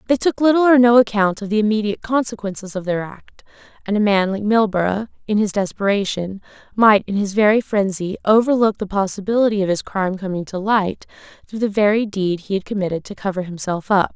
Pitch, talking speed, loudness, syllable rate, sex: 205 Hz, 195 wpm, -18 LUFS, 5.8 syllables/s, female